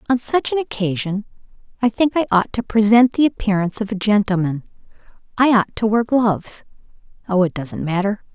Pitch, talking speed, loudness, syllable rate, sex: 215 Hz, 165 wpm, -18 LUFS, 5.6 syllables/s, female